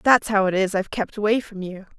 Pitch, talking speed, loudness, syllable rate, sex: 205 Hz, 270 wpm, -22 LUFS, 6.2 syllables/s, female